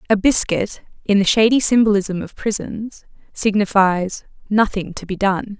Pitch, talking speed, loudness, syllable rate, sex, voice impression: 205 Hz, 140 wpm, -18 LUFS, 4.5 syllables/s, female, feminine, adult-like, tensed, slightly bright, clear, fluent, intellectual, elegant, slightly strict, sharp